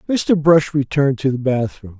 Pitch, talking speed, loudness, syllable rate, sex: 140 Hz, 180 wpm, -17 LUFS, 5.0 syllables/s, male